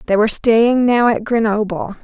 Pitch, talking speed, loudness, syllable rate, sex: 225 Hz, 175 wpm, -15 LUFS, 5.0 syllables/s, female